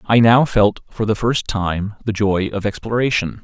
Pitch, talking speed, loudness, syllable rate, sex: 105 Hz, 190 wpm, -18 LUFS, 4.4 syllables/s, male